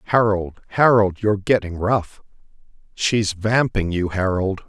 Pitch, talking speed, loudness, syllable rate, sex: 100 Hz, 115 wpm, -20 LUFS, 4.2 syllables/s, male